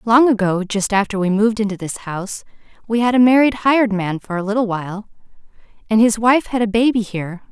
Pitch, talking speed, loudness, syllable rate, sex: 215 Hz, 210 wpm, -17 LUFS, 6.1 syllables/s, female